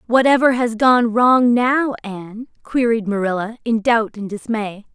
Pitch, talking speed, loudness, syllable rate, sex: 230 Hz, 145 wpm, -17 LUFS, 4.3 syllables/s, female